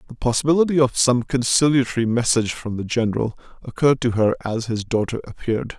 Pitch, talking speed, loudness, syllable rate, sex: 120 Hz, 165 wpm, -20 LUFS, 6.4 syllables/s, male